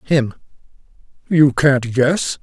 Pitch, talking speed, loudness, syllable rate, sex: 140 Hz, 100 wpm, -16 LUFS, 2.9 syllables/s, male